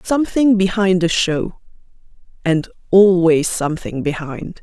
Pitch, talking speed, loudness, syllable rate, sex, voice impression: 180 Hz, 90 wpm, -16 LUFS, 4.3 syllables/s, female, feminine, middle-aged, tensed, powerful, hard, raspy, intellectual, calm, friendly, elegant, lively, slightly strict